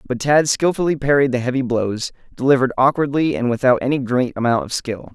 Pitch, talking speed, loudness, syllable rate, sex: 130 Hz, 185 wpm, -18 LUFS, 5.9 syllables/s, male